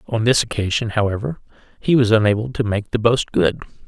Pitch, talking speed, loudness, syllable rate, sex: 110 Hz, 185 wpm, -19 LUFS, 5.9 syllables/s, male